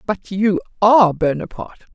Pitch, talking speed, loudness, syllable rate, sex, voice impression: 190 Hz, 125 wpm, -16 LUFS, 5.6 syllables/s, female, very feminine, adult-like, slightly middle-aged, very thin, tensed, slightly powerful, bright, very hard, very clear, fluent, slightly raspy, slightly cute, cool, intellectual, refreshing, very sincere, calm, slightly friendly, slightly reassuring, very unique, slightly elegant, slightly wild, slightly sweet, lively, strict, slightly intense, very sharp, slightly light